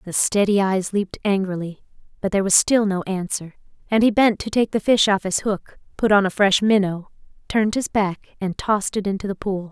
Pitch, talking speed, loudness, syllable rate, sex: 200 Hz, 215 wpm, -20 LUFS, 5.5 syllables/s, female